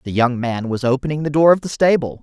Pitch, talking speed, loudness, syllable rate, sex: 135 Hz, 270 wpm, -17 LUFS, 6.1 syllables/s, male